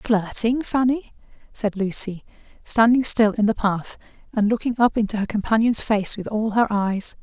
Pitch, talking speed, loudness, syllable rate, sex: 215 Hz, 165 wpm, -21 LUFS, 4.6 syllables/s, female